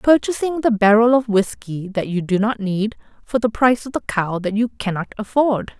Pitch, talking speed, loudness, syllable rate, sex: 220 Hz, 205 wpm, -19 LUFS, 5.0 syllables/s, female